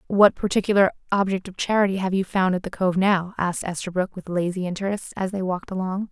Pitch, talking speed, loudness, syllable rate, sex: 190 Hz, 205 wpm, -23 LUFS, 6.3 syllables/s, female